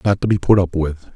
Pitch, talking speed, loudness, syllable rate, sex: 95 Hz, 310 wpm, -17 LUFS, 6.5 syllables/s, male